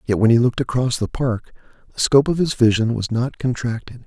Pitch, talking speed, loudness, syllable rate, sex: 120 Hz, 220 wpm, -19 LUFS, 5.9 syllables/s, male